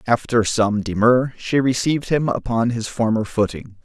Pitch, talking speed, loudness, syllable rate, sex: 115 Hz, 155 wpm, -19 LUFS, 4.7 syllables/s, male